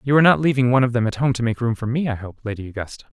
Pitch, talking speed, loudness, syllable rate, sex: 120 Hz, 340 wpm, -20 LUFS, 8.1 syllables/s, male